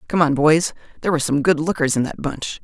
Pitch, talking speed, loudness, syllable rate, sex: 155 Hz, 225 wpm, -19 LUFS, 6.4 syllables/s, female